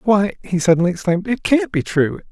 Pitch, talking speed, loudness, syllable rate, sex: 185 Hz, 210 wpm, -18 LUFS, 5.9 syllables/s, male